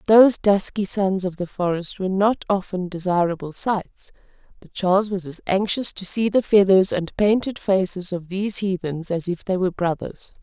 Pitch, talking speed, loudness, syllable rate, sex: 190 Hz, 180 wpm, -21 LUFS, 5.0 syllables/s, female